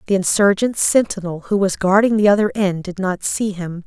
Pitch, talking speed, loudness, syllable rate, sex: 195 Hz, 200 wpm, -17 LUFS, 5.2 syllables/s, female